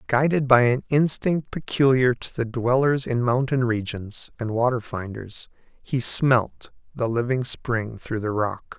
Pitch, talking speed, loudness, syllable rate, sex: 125 Hz, 150 wpm, -23 LUFS, 4.0 syllables/s, male